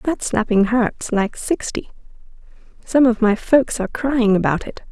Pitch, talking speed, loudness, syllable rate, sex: 230 Hz, 160 wpm, -18 LUFS, 4.5 syllables/s, female